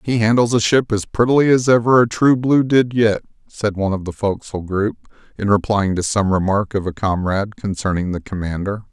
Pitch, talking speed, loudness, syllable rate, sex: 105 Hz, 200 wpm, -18 LUFS, 5.7 syllables/s, male